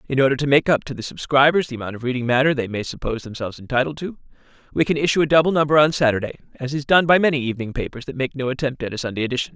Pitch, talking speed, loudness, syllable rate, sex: 135 Hz, 265 wpm, -20 LUFS, 7.8 syllables/s, male